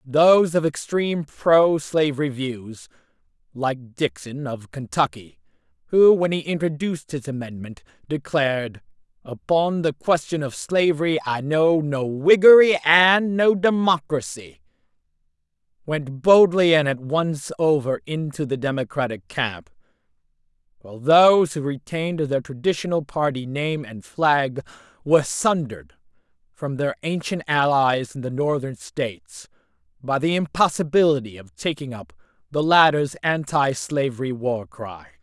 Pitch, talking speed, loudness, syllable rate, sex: 145 Hz, 115 wpm, -21 LUFS, 4.4 syllables/s, male